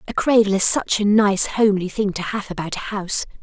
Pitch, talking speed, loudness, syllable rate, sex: 200 Hz, 230 wpm, -19 LUFS, 5.8 syllables/s, female